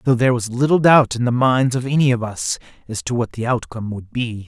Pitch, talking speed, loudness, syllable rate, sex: 125 Hz, 255 wpm, -18 LUFS, 6.0 syllables/s, male